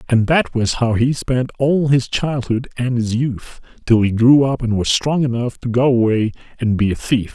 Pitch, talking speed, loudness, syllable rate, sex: 120 Hz, 220 wpm, -17 LUFS, 4.7 syllables/s, male